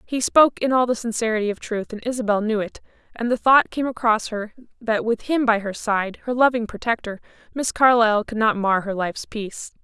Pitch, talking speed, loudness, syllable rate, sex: 225 Hz, 215 wpm, -21 LUFS, 5.7 syllables/s, female